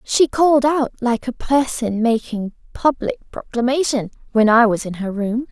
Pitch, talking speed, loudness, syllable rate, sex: 245 Hz, 165 wpm, -18 LUFS, 4.5 syllables/s, female